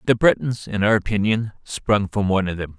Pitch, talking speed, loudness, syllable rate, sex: 105 Hz, 215 wpm, -21 LUFS, 5.6 syllables/s, male